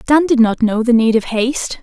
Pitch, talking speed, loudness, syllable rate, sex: 240 Hz, 265 wpm, -14 LUFS, 5.5 syllables/s, female